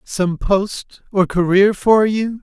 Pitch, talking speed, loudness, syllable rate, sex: 200 Hz, 150 wpm, -16 LUFS, 3.1 syllables/s, male